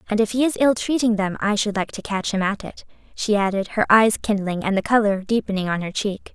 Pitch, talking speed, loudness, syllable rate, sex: 210 Hz, 255 wpm, -21 LUFS, 5.7 syllables/s, female